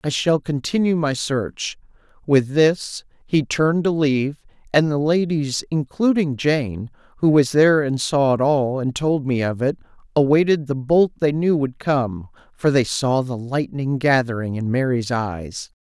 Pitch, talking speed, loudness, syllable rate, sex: 140 Hz, 165 wpm, -20 LUFS, 4.3 syllables/s, male